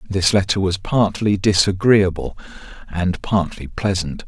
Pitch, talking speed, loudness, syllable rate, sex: 95 Hz, 110 wpm, -18 LUFS, 4.2 syllables/s, male